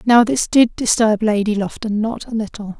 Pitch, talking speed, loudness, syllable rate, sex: 220 Hz, 195 wpm, -17 LUFS, 4.8 syllables/s, female